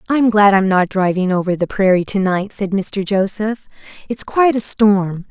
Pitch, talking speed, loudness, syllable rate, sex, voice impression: 200 Hz, 180 wpm, -16 LUFS, 4.7 syllables/s, female, very feminine, adult-like, slightly tensed, clear, slightly intellectual, slightly calm